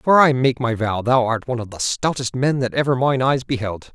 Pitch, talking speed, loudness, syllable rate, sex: 125 Hz, 260 wpm, -19 LUFS, 5.4 syllables/s, male